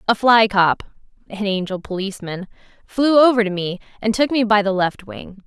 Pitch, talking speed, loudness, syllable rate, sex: 210 Hz, 165 wpm, -18 LUFS, 5.1 syllables/s, female